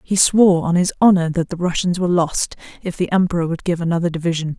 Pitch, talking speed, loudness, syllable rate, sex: 175 Hz, 225 wpm, -18 LUFS, 6.5 syllables/s, female